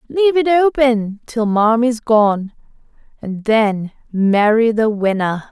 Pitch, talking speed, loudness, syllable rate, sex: 225 Hz, 120 wpm, -15 LUFS, 3.6 syllables/s, female